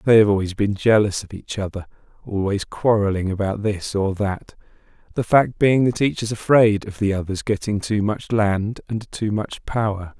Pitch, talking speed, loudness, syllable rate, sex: 105 Hz, 190 wpm, -21 LUFS, 4.8 syllables/s, male